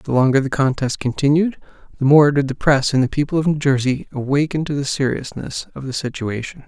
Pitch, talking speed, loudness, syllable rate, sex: 140 Hz, 205 wpm, -18 LUFS, 5.7 syllables/s, male